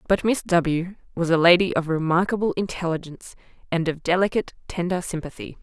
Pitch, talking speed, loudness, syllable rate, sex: 175 Hz, 150 wpm, -22 LUFS, 5.8 syllables/s, female